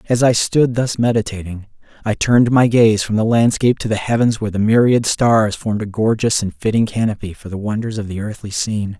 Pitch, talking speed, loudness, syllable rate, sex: 110 Hz, 215 wpm, -16 LUFS, 5.8 syllables/s, male